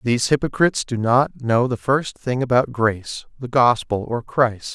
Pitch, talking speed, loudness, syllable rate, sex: 125 Hz, 175 wpm, -20 LUFS, 4.7 syllables/s, male